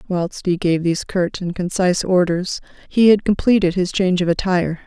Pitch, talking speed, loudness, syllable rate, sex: 180 Hz, 185 wpm, -18 LUFS, 5.5 syllables/s, female